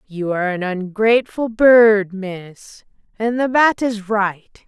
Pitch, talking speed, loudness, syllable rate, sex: 210 Hz, 140 wpm, -17 LUFS, 3.6 syllables/s, female